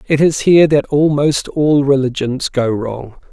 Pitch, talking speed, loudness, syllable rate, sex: 140 Hz, 165 wpm, -14 LUFS, 4.3 syllables/s, male